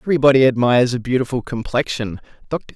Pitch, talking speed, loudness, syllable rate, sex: 125 Hz, 130 wpm, -18 LUFS, 6.6 syllables/s, male